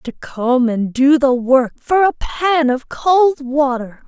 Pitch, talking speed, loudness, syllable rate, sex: 275 Hz, 175 wpm, -15 LUFS, 3.3 syllables/s, female